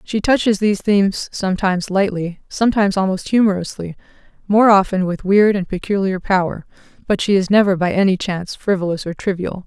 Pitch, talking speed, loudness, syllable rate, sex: 195 Hz, 160 wpm, -17 LUFS, 5.8 syllables/s, female